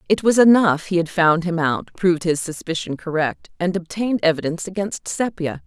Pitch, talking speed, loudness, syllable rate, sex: 175 Hz, 180 wpm, -20 LUFS, 5.4 syllables/s, female